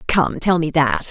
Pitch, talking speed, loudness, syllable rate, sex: 160 Hz, 215 wpm, -18 LUFS, 4.2 syllables/s, female